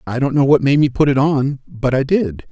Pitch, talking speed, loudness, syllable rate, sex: 135 Hz, 285 wpm, -16 LUFS, 5.2 syllables/s, male